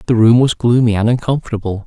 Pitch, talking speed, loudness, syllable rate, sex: 115 Hz, 195 wpm, -14 LUFS, 6.5 syllables/s, male